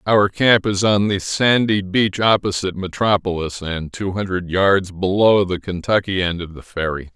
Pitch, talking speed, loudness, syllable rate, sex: 95 Hz, 170 wpm, -18 LUFS, 4.6 syllables/s, male